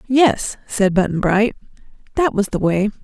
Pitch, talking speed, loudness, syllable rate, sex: 210 Hz, 160 wpm, -18 LUFS, 4.3 syllables/s, female